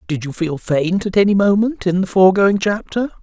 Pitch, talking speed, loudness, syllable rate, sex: 190 Hz, 205 wpm, -16 LUFS, 5.4 syllables/s, male